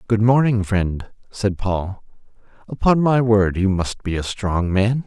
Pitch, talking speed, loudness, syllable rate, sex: 105 Hz, 165 wpm, -19 LUFS, 3.9 syllables/s, male